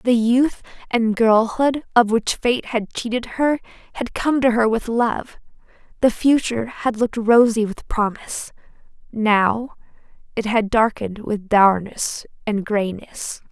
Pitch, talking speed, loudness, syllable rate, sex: 230 Hz, 140 wpm, -20 LUFS, 4.1 syllables/s, female